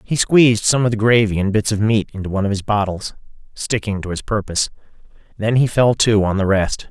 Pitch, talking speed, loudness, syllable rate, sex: 105 Hz, 225 wpm, -17 LUFS, 6.0 syllables/s, male